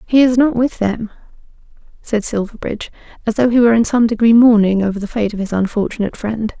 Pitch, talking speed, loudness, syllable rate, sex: 220 Hz, 200 wpm, -15 LUFS, 6.3 syllables/s, female